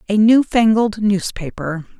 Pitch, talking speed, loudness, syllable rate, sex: 205 Hz, 90 wpm, -16 LUFS, 4.1 syllables/s, female